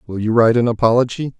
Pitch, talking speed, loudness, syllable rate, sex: 115 Hz, 215 wpm, -16 LUFS, 7.3 syllables/s, male